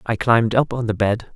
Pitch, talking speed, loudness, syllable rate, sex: 115 Hz, 265 wpm, -19 LUFS, 5.7 syllables/s, male